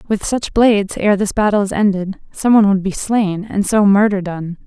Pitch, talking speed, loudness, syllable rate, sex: 200 Hz, 220 wpm, -15 LUFS, 5.1 syllables/s, female